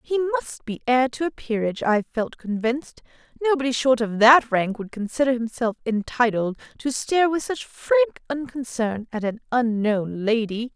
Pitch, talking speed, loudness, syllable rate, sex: 250 Hz, 160 wpm, -23 LUFS, 5.5 syllables/s, female